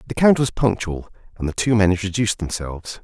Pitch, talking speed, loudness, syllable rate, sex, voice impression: 100 Hz, 200 wpm, -20 LUFS, 6.3 syllables/s, male, masculine, very adult-like, slightly middle-aged, thick, tensed, powerful, bright, slightly hard, slightly muffled, very fluent, very cool, intellectual, refreshing, very sincere, calm, mature, friendly, very reassuring, slightly unique, wild, sweet, slightly lively, very kind